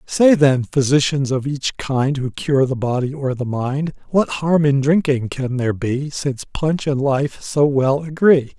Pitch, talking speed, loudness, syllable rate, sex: 140 Hz, 190 wpm, -18 LUFS, 4.1 syllables/s, male